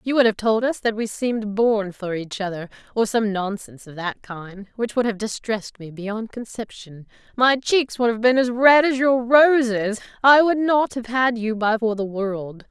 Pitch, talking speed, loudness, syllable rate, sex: 225 Hz, 210 wpm, -20 LUFS, 4.6 syllables/s, female